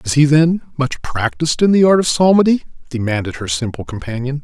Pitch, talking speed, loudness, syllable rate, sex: 145 Hz, 190 wpm, -16 LUFS, 5.9 syllables/s, male